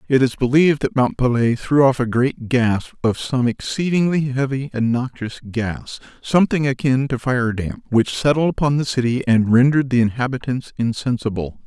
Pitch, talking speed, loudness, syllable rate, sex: 130 Hz, 165 wpm, -19 LUFS, 5.1 syllables/s, male